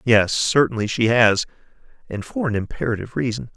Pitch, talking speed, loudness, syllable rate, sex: 115 Hz, 150 wpm, -20 LUFS, 5.7 syllables/s, male